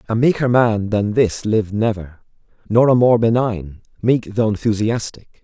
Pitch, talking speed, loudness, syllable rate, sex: 110 Hz, 155 wpm, -17 LUFS, 4.6 syllables/s, male